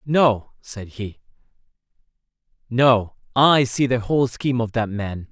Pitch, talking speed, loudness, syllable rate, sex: 120 Hz, 135 wpm, -20 LUFS, 4.0 syllables/s, male